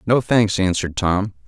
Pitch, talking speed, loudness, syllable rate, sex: 100 Hz, 165 wpm, -19 LUFS, 4.9 syllables/s, male